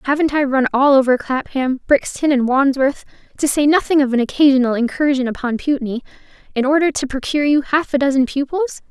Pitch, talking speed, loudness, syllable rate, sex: 275 Hz, 170 wpm, -17 LUFS, 5.8 syllables/s, female